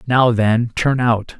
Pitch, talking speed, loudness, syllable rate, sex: 120 Hz, 170 wpm, -16 LUFS, 3.3 syllables/s, male